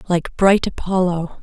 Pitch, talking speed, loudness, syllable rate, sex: 180 Hz, 125 wpm, -18 LUFS, 4.2 syllables/s, female